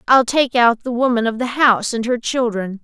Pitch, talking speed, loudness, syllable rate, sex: 240 Hz, 230 wpm, -17 LUFS, 5.2 syllables/s, female